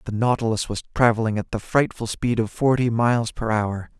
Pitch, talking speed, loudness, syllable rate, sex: 115 Hz, 195 wpm, -22 LUFS, 5.4 syllables/s, male